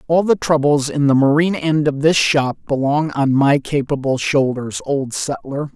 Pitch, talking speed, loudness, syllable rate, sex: 145 Hz, 175 wpm, -17 LUFS, 4.6 syllables/s, male